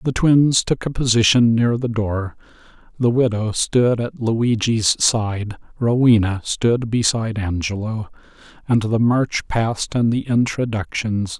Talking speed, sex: 135 wpm, male